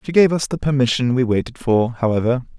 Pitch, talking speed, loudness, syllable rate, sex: 130 Hz, 210 wpm, -18 LUFS, 5.9 syllables/s, male